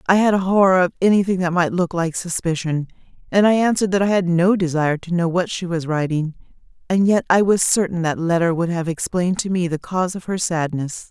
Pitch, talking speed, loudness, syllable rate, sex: 175 Hz, 225 wpm, -19 LUFS, 5.9 syllables/s, female